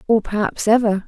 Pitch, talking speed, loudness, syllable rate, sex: 215 Hz, 165 wpm, -18 LUFS, 5.5 syllables/s, female